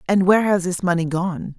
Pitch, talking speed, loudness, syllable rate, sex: 180 Hz, 225 wpm, -19 LUFS, 5.7 syllables/s, female